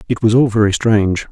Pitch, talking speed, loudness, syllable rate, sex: 110 Hz, 230 wpm, -14 LUFS, 6.3 syllables/s, male